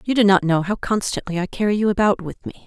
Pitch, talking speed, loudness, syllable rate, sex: 195 Hz, 270 wpm, -19 LUFS, 6.5 syllables/s, female